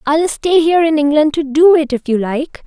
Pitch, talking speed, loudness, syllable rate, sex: 300 Hz, 245 wpm, -13 LUFS, 5.2 syllables/s, female